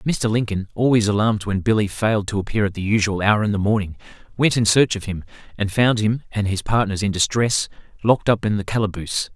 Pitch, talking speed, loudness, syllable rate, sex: 105 Hz, 220 wpm, -20 LUFS, 6.0 syllables/s, male